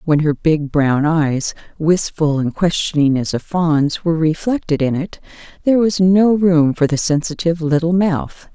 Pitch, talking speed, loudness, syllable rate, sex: 160 Hz, 170 wpm, -16 LUFS, 4.5 syllables/s, female